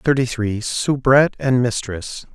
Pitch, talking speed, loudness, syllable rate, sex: 125 Hz, 130 wpm, -18 LUFS, 4.0 syllables/s, male